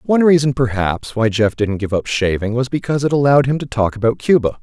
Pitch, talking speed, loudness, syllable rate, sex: 125 Hz, 235 wpm, -16 LUFS, 6.2 syllables/s, male